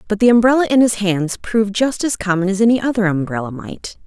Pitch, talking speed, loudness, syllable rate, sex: 205 Hz, 220 wpm, -16 LUFS, 6.0 syllables/s, female